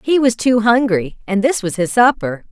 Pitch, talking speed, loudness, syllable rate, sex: 225 Hz, 215 wpm, -15 LUFS, 4.8 syllables/s, female